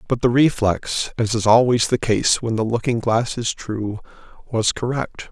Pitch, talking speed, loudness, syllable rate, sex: 115 Hz, 180 wpm, -20 LUFS, 4.4 syllables/s, male